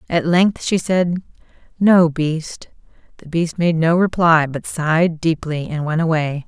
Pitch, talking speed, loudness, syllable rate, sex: 165 Hz, 160 wpm, -17 LUFS, 4.0 syllables/s, female